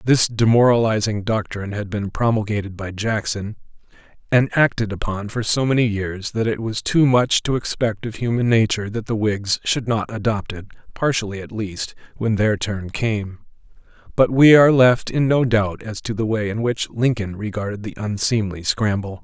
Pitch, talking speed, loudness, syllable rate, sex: 110 Hz, 180 wpm, -20 LUFS, 4.9 syllables/s, male